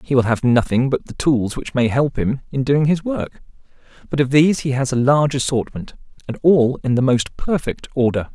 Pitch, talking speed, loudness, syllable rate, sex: 135 Hz, 215 wpm, -18 LUFS, 5.2 syllables/s, male